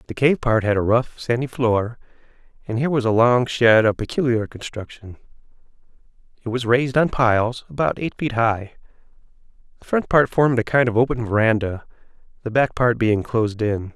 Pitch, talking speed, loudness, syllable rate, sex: 120 Hz, 175 wpm, -20 LUFS, 5.4 syllables/s, male